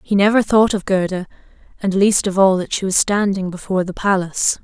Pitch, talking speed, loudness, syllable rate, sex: 190 Hz, 205 wpm, -17 LUFS, 5.8 syllables/s, female